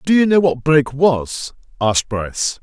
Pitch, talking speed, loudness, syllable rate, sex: 140 Hz, 185 wpm, -17 LUFS, 4.9 syllables/s, male